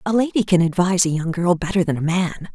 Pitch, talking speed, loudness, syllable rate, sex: 180 Hz, 260 wpm, -19 LUFS, 6.2 syllables/s, female